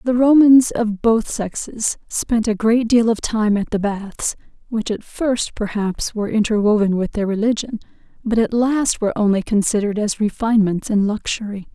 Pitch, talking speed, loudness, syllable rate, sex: 220 Hz, 170 wpm, -18 LUFS, 4.9 syllables/s, female